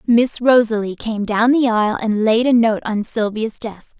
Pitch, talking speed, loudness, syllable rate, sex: 225 Hz, 195 wpm, -17 LUFS, 4.6 syllables/s, female